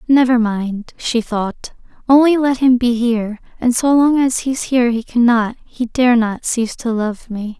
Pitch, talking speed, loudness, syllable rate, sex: 240 Hz, 190 wpm, -16 LUFS, 4.4 syllables/s, female